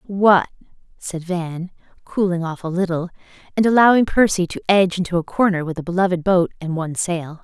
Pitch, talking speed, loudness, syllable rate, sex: 180 Hz, 180 wpm, -19 LUFS, 5.6 syllables/s, female